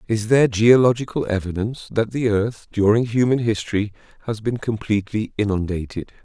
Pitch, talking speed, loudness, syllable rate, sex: 110 Hz, 135 wpm, -20 LUFS, 5.6 syllables/s, male